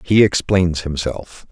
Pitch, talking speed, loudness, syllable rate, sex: 85 Hz, 120 wpm, -17 LUFS, 3.6 syllables/s, male